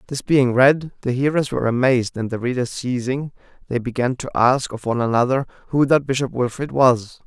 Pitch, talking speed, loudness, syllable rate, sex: 130 Hz, 190 wpm, -20 LUFS, 5.6 syllables/s, male